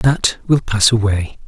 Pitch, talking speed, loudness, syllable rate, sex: 110 Hz, 165 wpm, -16 LUFS, 3.8 syllables/s, male